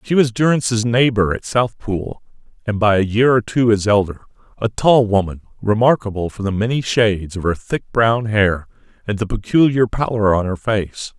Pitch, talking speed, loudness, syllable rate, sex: 110 Hz, 175 wpm, -17 LUFS, 5.1 syllables/s, male